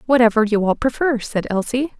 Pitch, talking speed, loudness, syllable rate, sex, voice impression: 235 Hz, 180 wpm, -18 LUFS, 5.5 syllables/s, female, feminine, slightly adult-like, fluent, slightly cute, slightly refreshing, slightly sincere, friendly